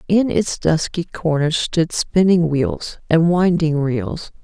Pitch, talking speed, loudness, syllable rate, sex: 160 Hz, 135 wpm, -18 LUFS, 3.5 syllables/s, female